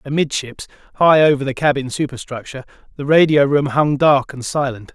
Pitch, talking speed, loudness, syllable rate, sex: 140 Hz, 160 wpm, -16 LUFS, 5.5 syllables/s, male